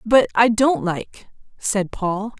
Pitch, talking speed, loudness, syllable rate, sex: 215 Hz, 150 wpm, -19 LUFS, 3.2 syllables/s, female